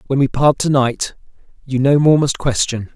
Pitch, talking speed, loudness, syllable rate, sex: 135 Hz, 205 wpm, -16 LUFS, 4.9 syllables/s, male